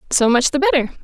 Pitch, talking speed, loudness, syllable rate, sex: 260 Hz, 230 wpm, -16 LUFS, 6.9 syllables/s, female